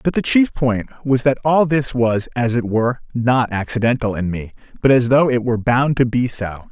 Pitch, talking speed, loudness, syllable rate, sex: 125 Hz, 225 wpm, -17 LUFS, 4.9 syllables/s, male